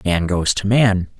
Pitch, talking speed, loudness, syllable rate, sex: 100 Hz, 200 wpm, -17 LUFS, 4.0 syllables/s, male